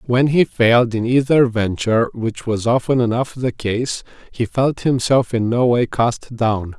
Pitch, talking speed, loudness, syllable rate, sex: 120 Hz, 160 wpm, -18 LUFS, 4.3 syllables/s, male